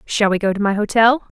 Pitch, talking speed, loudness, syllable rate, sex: 215 Hz, 255 wpm, -16 LUFS, 5.8 syllables/s, female